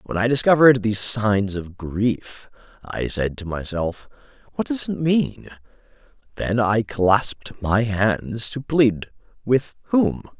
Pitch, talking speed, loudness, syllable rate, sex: 115 Hz, 135 wpm, -21 LUFS, 3.8 syllables/s, male